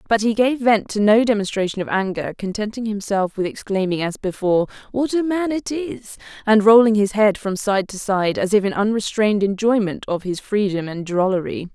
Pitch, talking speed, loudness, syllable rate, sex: 210 Hz, 195 wpm, -19 LUFS, 5.3 syllables/s, female